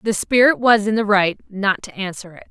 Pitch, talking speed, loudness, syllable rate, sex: 200 Hz, 240 wpm, -17 LUFS, 5.2 syllables/s, female